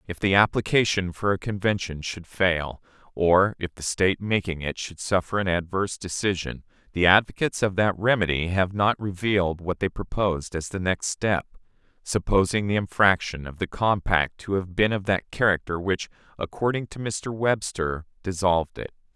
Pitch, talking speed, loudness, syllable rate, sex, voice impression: 95 Hz, 165 wpm, -24 LUFS, 5.0 syllables/s, male, masculine, adult-like, cool, slightly intellectual, slightly refreshing, slightly calm